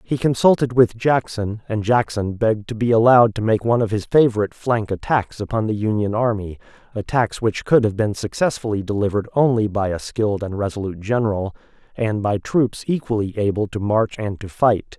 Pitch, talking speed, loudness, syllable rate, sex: 110 Hz, 185 wpm, -20 LUFS, 5.6 syllables/s, male